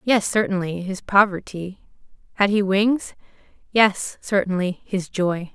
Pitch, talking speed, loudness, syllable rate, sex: 195 Hz, 120 wpm, -21 LUFS, 3.9 syllables/s, female